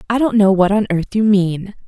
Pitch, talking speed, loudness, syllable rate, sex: 200 Hz, 255 wpm, -15 LUFS, 5.1 syllables/s, female